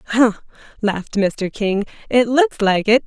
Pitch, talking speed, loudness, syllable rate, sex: 220 Hz, 155 wpm, -18 LUFS, 4.2 syllables/s, female